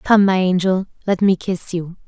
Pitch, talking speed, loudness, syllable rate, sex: 185 Hz, 205 wpm, -18 LUFS, 4.7 syllables/s, female